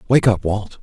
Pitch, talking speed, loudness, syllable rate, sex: 100 Hz, 215 wpm, -18 LUFS, 4.8 syllables/s, male